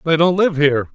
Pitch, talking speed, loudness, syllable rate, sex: 160 Hz, 255 wpm, -15 LUFS, 6.2 syllables/s, male